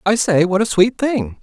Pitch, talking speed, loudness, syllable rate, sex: 195 Hz, 250 wpm, -16 LUFS, 4.6 syllables/s, male